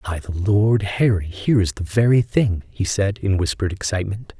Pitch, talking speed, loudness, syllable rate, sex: 100 Hz, 190 wpm, -20 LUFS, 5.6 syllables/s, male